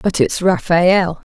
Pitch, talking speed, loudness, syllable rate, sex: 180 Hz, 135 wpm, -15 LUFS, 3.3 syllables/s, female